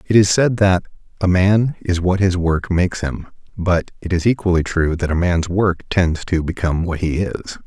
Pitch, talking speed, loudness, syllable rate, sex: 90 Hz, 210 wpm, -18 LUFS, 5.0 syllables/s, male